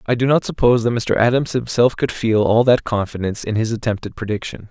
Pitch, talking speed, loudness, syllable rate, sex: 115 Hz, 215 wpm, -18 LUFS, 6.1 syllables/s, male